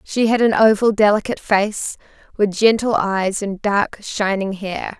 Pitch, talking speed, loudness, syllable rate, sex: 205 Hz, 155 wpm, -18 LUFS, 4.3 syllables/s, female